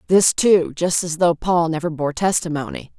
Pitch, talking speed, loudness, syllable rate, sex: 170 Hz, 180 wpm, -19 LUFS, 4.8 syllables/s, female